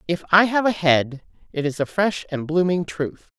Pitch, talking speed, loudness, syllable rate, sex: 170 Hz, 215 wpm, -21 LUFS, 4.7 syllables/s, female